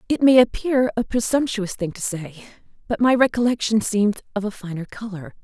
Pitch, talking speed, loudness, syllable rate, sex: 220 Hz, 175 wpm, -21 LUFS, 5.5 syllables/s, female